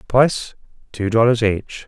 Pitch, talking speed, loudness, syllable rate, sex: 115 Hz, 130 wpm, -18 LUFS, 4.4 syllables/s, male